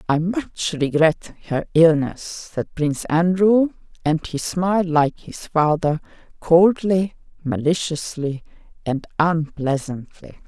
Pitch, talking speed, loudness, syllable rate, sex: 165 Hz, 105 wpm, -20 LUFS, 3.7 syllables/s, female